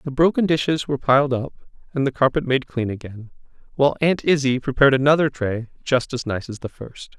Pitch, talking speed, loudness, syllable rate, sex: 135 Hz, 200 wpm, -20 LUFS, 5.9 syllables/s, male